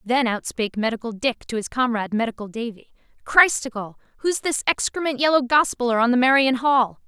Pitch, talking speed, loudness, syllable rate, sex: 245 Hz, 160 wpm, -21 LUFS, 5.9 syllables/s, female